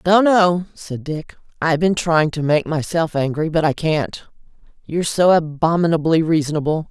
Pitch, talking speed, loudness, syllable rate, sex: 160 Hz, 155 wpm, -18 LUFS, 4.9 syllables/s, female